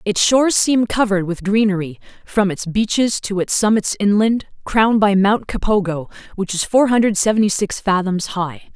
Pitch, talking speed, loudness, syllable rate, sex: 205 Hz, 170 wpm, -17 LUFS, 5.2 syllables/s, female